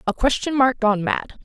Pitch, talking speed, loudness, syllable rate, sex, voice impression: 240 Hz, 210 wpm, -20 LUFS, 5.3 syllables/s, female, feminine, adult-like, tensed, slightly bright, clear, fluent, intellectual, friendly, unique, lively, slightly sharp